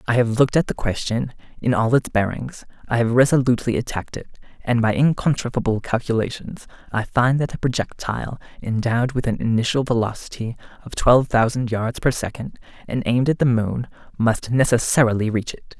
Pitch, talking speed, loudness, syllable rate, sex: 120 Hz, 165 wpm, -21 LUFS, 5.9 syllables/s, male